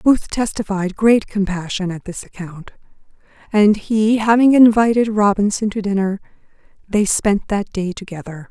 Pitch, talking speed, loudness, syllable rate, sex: 205 Hz, 135 wpm, -17 LUFS, 4.6 syllables/s, female